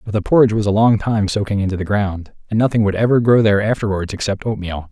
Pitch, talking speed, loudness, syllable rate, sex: 105 Hz, 245 wpm, -17 LUFS, 6.7 syllables/s, male